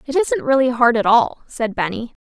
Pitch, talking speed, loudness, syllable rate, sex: 250 Hz, 215 wpm, -17 LUFS, 5.0 syllables/s, female